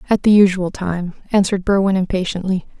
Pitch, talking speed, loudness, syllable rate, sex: 190 Hz, 150 wpm, -17 LUFS, 6.0 syllables/s, female